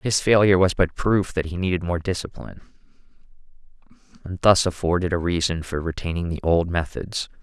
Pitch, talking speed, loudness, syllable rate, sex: 90 Hz, 160 wpm, -22 LUFS, 5.7 syllables/s, male